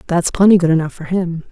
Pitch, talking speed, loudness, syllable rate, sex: 175 Hz, 240 wpm, -15 LUFS, 6.2 syllables/s, female